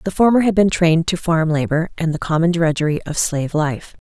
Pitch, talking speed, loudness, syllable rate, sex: 165 Hz, 220 wpm, -17 LUFS, 5.8 syllables/s, female